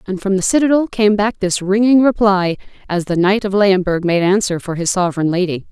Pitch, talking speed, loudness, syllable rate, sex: 195 Hz, 210 wpm, -15 LUFS, 5.7 syllables/s, female